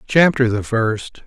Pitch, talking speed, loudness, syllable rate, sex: 120 Hz, 140 wpm, -18 LUFS, 3.6 syllables/s, male